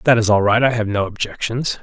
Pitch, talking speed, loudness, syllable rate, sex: 110 Hz, 265 wpm, -17 LUFS, 5.6 syllables/s, male